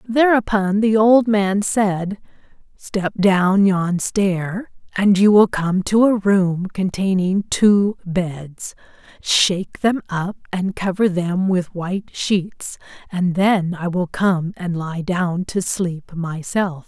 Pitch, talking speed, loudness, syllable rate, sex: 190 Hz, 140 wpm, -18 LUFS, 3.2 syllables/s, female